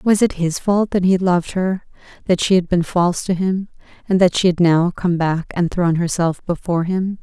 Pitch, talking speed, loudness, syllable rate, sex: 180 Hz, 235 wpm, -18 LUFS, 5.2 syllables/s, female